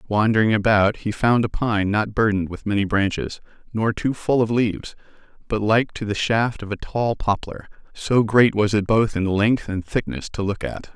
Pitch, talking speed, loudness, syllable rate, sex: 105 Hz, 205 wpm, -21 LUFS, 4.9 syllables/s, male